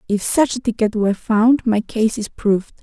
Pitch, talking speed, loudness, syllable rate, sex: 220 Hz, 210 wpm, -18 LUFS, 5.0 syllables/s, female